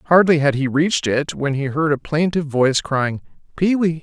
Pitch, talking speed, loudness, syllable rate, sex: 150 Hz, 210 wpm, -18 LUFS, 5.4 syllables/s, male